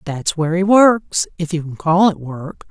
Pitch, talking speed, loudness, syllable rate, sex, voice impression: 170 Hz, 200 wpm, -16 LUFS, 4.5 syllables/s, female, very feminine, slightly old, slightly thin, very relaxed, weak, dark, very soft, very clear, very fluent, slightly raspy, slightly cute, cool, very refreshing, very sincere, very calm, very friendly, very reassuring, very unique, very elegant, slightly wild, very sweet, lively, very kind, modest